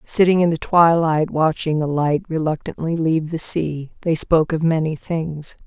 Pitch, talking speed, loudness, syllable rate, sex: 160 Hz, 170 wpm, -19 LUFS, 4.7 syllables/s, female